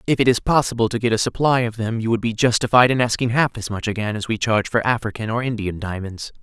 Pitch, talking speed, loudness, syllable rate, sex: 115 Hz, 260 wpm, -20 LUFS, 6.4 syllables/s, male